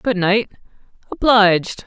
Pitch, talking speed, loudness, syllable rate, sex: 210 Hz, 95 wpm, -16 LUFS, 4.1 syllables/s, female